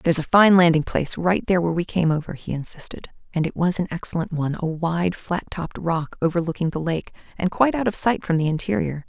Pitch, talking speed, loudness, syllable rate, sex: 170 Hz, 225 wpm, -22 LUFS, 6.3 syllables/s, female